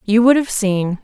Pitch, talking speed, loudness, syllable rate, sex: 220 Hz, 230 wpm, -15 LUFS, 4.3 syllables/s, female